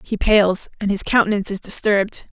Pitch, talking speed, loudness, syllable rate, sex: 205 Hz, 175 wpm, -19 LUFS, 5.7 syllables/s, female